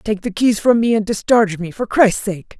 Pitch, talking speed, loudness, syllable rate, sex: 210 Hz, 255 wpm, -16 LUFS, 5.1 syllables/s, female